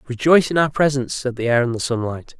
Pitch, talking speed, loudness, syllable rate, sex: 130 Hz, 250 wpm, -19 LUFS, 6.7 syllables/s, male